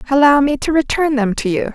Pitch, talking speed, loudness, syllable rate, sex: 270 Hz, 240 wpm, -15 LUFS, 5.9 syllables/s, female